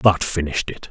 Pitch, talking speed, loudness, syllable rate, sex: 85 Hz, 200 wpm, -21 LUFS, 5.8 syllables/s, male